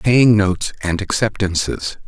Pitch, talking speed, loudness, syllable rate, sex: 100 Hz, 115 wpm, -17 LUFS, 4.3 syllables/s, male